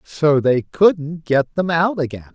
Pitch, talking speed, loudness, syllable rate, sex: 155 Hz, 180 wpm, -17 LUFS, 3.7 syllables/s, male